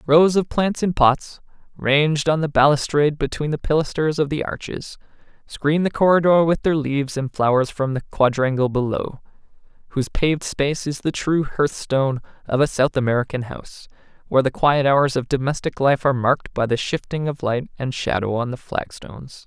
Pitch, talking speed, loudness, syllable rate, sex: 140 Hz, 180 wpm, -20 LUFS, 5.4 syllables/s, male